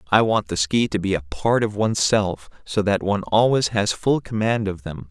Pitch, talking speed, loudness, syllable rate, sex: 100 Hz, 225 wpm, -21 LUFS, 5.0 syllables/s, male